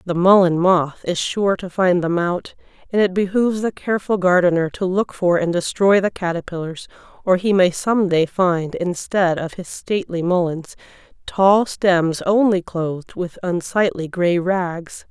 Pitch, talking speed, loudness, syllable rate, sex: 180 Hz, 165 wpm, -19 LUFS, 4.4 syllables/s, female